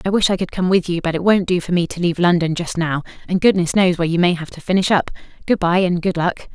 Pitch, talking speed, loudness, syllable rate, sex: 175 Hz, 305 wpm, -18 LUFS, 6.8 syllables/s, female